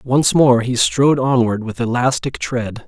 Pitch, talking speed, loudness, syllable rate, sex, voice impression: 125 Hz, 165 wpm, -16 LUFS, 4.3 syllables/s, male, very masculine, very adult-like, very middle-aged, very thick, relaxed, slightly weak, bright, soft, clear, fluent, very cool, intellectual, very sincere, very calm, mature, very friendly, very reassuring, unique, slightly elegant, wild, sweet, lively, kind, slightly modest